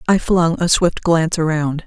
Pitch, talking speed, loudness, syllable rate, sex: 165 Hz, 195 wpm, -16 LUFS, 4.7 syllables/s, female